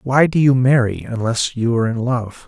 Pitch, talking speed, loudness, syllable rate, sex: 125 Hz, 170 wpm, -17 LUFS, 4.7 syllables/s, male